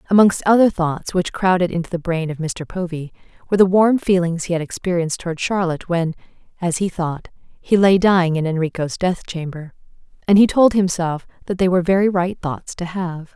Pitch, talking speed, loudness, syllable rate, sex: 180 Hz, 195 wpm, -18 LUFS, 5.5 syllables/s, female